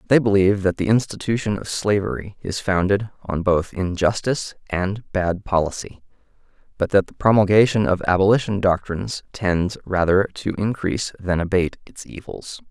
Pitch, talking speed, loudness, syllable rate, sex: 95 Hz, 140 wpm, -21 LUFS, 5.2 syllables/s, male